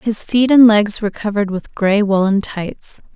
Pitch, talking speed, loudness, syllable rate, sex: 210 Hz, 190 wpm, -15 LUFS, 4.8 syllables/s, female